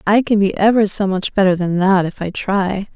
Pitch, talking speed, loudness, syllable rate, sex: 195 Hz, 245 wpm, -16 LUFS, 5.0 syllables/s, female